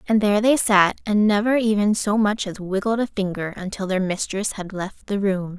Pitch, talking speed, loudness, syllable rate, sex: 200 Hz, 215 wpm, -21 LUFS, 5.1 syllables/s, female